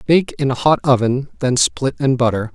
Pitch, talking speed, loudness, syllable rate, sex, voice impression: 130 Hz, 210 wpm, -17 LUFS, 5.1 syllables/s, male, masculine, adult-like, tensed, slightly powerful, bright, clear, cool, intellectual, slightly calm, friendly, lively, kind, slightly modest